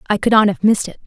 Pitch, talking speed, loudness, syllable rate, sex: 200 Hz, 335 wpm, -15 LUFS, 8.5 syllables/s, female